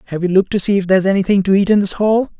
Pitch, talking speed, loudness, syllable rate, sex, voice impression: 195 Hz, 325 wpm, -14 LUFS, 8.2 syllables/s, male, very masculine, slightly young, adult-like, thick, slightly tensed, weak, slightly dark, slightly soft, clear, fluent, slightly raspy, cool, intellectual, slightly refreshing, sincere, very calm, friendly, slightly reassuring, unique, slightly elegant, slightly wild, slightly lively, kind, modest